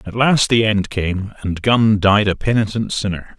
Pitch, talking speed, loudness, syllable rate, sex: 105 Hz, 195 wpm, -17 LUFS, 4.4 syllables/s, male